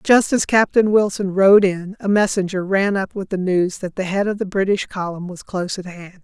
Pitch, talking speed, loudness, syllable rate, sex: 190 Hz, 230 wpm, -18 LUFS, 5.1 syllables/s, female